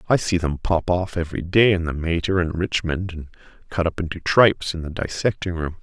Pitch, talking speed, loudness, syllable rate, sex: 85 Hz, 205 wpm, -22 LUFS, 5.6 syllables/s, male